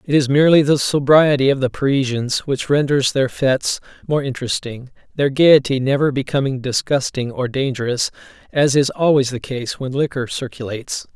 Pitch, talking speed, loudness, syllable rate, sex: 135 Hz, 155 wpm, -18 LUFS, 5.3 syllables/s, male